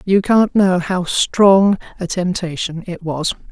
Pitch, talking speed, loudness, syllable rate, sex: 185 Hz, 155 wpm, -16 LUFS, 3.7 syllables/s, female